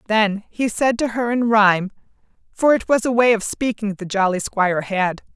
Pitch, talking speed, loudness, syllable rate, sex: 215 Hz, 200 wpm, -19 LUFS, 2.5 syllables/s, female